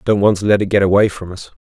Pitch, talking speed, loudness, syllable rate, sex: 100 Hz, 335 wpm, -14 LUFS, 6.9 syllables/s, male